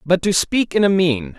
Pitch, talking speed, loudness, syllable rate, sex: 170 Hz, 260 wpm, -17 LUFS, 4.7 syllables/s, male